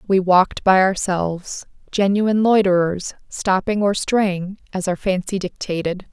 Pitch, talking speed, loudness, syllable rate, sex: 190 Hz, 125 wpm, -19 LUFS, 4.4 syllables/s, female